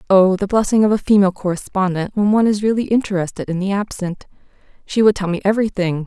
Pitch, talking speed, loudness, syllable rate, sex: 195 Hz, 200 wpm, -17 LUFS, 6.7 syllables/s, female